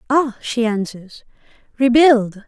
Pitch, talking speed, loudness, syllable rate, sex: 240 Hz, 95 wpm, -16 LUFS, 3.6 syllables/s, female